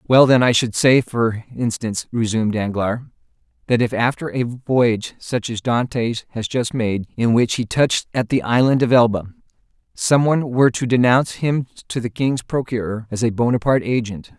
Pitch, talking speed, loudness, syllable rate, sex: 120 Hz, 180 wpm, -19 LUFS, 5.2 syllables/s, male